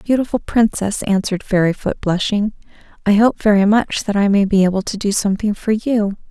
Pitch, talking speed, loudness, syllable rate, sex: 205 Hz, 180 wpm, -17 LUFS, 5.5 syllables/s, female